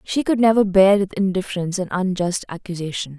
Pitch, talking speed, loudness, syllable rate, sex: 190 Hz, 170 wpm, -19 LUFS, 5.9 syllables/s, female